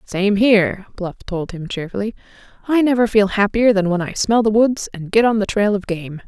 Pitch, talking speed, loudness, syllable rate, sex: 205 Hz, 220 wpm, -18 LUFS, 5.2 syllables/s, female